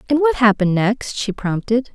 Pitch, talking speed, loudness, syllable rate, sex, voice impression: 230 Hz, 185 wpm, -18 LUFS, 5.1 syllables/s, female, very feminine, young, very thin, tensed, slightly powerful, bright, soft, very clear, fluent, very cute, slightly intellectual, refreshing, sincere, very calm, friendly, reassuring, slightly unique, elegant, slightly wild, sweet, kind, slightly modest, slightly light